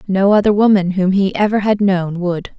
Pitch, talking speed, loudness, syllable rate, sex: 195 Hz, 210 wpm, -15 LUFS, 4.9 syllables/s, female